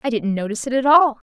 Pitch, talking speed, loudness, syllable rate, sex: 240 Hz, 275 wpm, -18 LUFS, 7.1 syllables/s, female